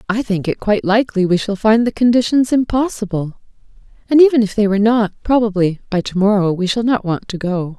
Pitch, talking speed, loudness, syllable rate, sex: 210 Hz, 210 wpm, -16 LUFS, 5.9 syllables/s, female